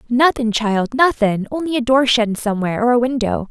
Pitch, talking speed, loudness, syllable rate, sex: 240 Hz, 190 wpm, -17 LUFS, 5.8 syllables/s, female